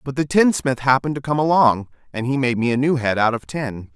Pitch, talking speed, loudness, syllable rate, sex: 135 Hz, 260 wpm, -19 LUFS, 5.9 syllables/s, male